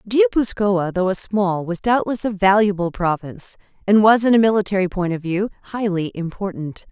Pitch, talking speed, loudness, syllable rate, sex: 195 Hz, 165 wpm, -19 LUFS, 5.3 syllables/s, female